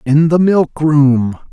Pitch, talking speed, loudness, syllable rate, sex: 150 Hz, 160 wpm, -12 LUFS, 3.1 syllables/s, male